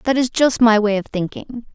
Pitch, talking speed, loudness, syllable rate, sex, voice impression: 230 Hz, 240 wpm, -17 LUFS, 5.1 syllables/s, female, feminine, slightly gender-neutral, young, tensed, powerful, bright, clear, fluent, cute, friendly, unique, lively, slightly kind